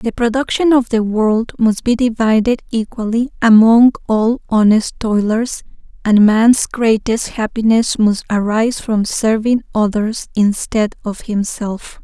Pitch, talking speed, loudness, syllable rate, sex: 225 Hz, 125 wpm, -15 LUFS, 4.0 syllables/s, female